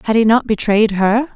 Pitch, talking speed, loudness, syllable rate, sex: 220 Hz, 220 wpm, -14 LUFS, 5.3 syllables/s, female